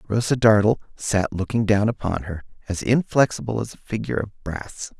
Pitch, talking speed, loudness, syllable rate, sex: 105 Hz, 170 wpm, -22 LUFS, 5.4 syllables/s, male